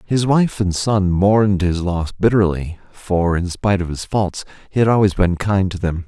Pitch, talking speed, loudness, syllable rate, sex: 95 Hz, 205 wpm, -18 LUFS, 4.7 syllables/s, male